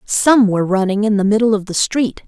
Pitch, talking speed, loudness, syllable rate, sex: 210 Hz, 235 wpm, -15 LUFS, 5.6 syllables/s, female